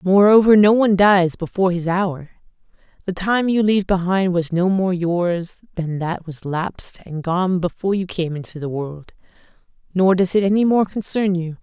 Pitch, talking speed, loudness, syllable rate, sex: 185 Hz, 180 wpm, -18 LUFS, 4.9 syllables/s, female